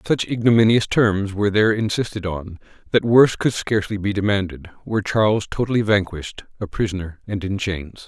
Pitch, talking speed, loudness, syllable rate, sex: 100 Hz, 165 wpm, -20 LUFS, 5.8 syllables/s, male